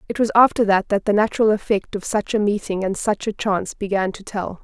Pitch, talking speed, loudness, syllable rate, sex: 205 Hz, 245 wpm, -20 LUFS, 5.8 syllables/s, female